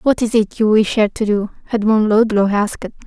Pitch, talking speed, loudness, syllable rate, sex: 215 Hz, 215 wpm, -16 LUFS, 5.2 syllables/s, female